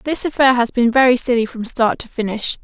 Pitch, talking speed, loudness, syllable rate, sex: 245 Hz, 230 wpm, -16 LUFS, 5.6 syllables/s, female